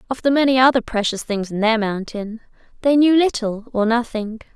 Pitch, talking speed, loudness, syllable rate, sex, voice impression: 235 Hz, 185 wpm, -18 LUFS, 5.4 syllables/s, female, feminine, slightly young, tensed, powerful, bright, clear, slightly intellectual, friendly, lively